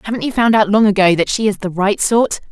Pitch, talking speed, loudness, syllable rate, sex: 210 Hz, 285 wpm, -14 LUFS, 6.1 syllables/s, female